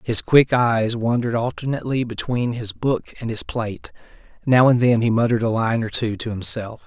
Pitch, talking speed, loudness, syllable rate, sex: 115 Hz, 190 wpm, -20 LUFS, 5.4 syllables/s, male